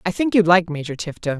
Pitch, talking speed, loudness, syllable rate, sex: 175 Hz, 260 wpm, -19 LUFS, 6.3 syllables/s, female